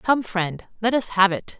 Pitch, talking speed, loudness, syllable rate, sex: 205 Hz, 225 wpm, -22 LUFS, 4.2 syllables/s, female